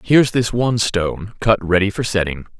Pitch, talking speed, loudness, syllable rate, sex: 105 Hz, 185 wpm, -18 LUFS, 5.6 syllables/s, male